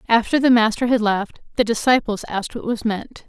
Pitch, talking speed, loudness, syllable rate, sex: 225 Hz, 200 wpm, -19 LUFS, 5.4 syllables/s, female